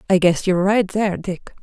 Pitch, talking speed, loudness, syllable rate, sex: 190 Hz, 220 wpm, -19 LUFS, 5.8 syllables/s, female